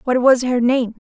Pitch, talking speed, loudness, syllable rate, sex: 250 Hz, 225 wpm, -16 LUFS, 4.7 syllables/s, female